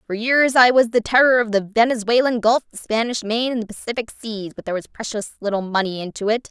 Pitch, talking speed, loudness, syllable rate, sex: 225 Hz, 230 wpm, -19 LUFS, 6.1 syllables/s, female